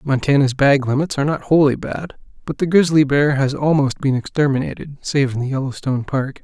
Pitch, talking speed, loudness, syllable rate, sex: 140 Hz, 185 wpm, -18 LUFS, 5.7 syllables/s, male